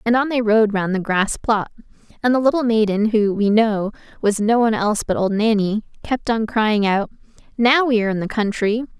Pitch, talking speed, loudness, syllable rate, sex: 220 Hz, 215 wpm, -18 LUFS, 5.4 syllables/s, female